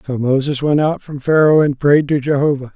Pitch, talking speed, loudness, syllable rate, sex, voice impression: 140 Hz, 220 wpm, -15 LUFS, 5.4 syllables/s, male, very masculine, old, very relaxed, very weak, very dark, very soft, very muffled, slightly halting, raspy, slightly cool, intellectual, very sincere, very calm, very mature, slightly friendly, slightly reassuring, very unique, very elegant, slightly wild, slightly sweet, lively, very kind, very modest